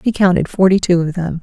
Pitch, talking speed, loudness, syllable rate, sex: 185 Hz, 250 wpm, -14 LUFS, 5.8 syllables/s, female